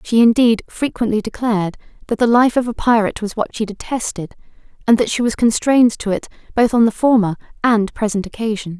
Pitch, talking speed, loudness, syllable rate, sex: 220 Hz, 190 wpm, -17 LUFS, 5.9 syllables/s, female